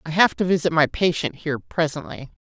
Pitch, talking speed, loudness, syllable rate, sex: 155 Hz, 195 wpm, -21 LUFS, 5.8 syllables/s, female